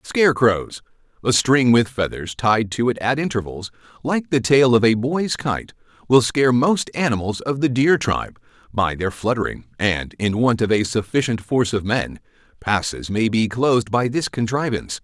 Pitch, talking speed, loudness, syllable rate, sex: 120 Hz, 170 wpm, -19 LUFS, 4.9 syllables/s, male